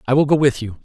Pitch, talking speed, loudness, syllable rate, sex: 135 Hz, 355 wpm, -16 LUFS, 7.4 syllables/s, male